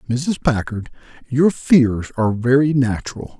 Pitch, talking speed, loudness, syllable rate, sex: 125 Hz, 125 wpm, -18 LUFS, 4.4 syllables/s, male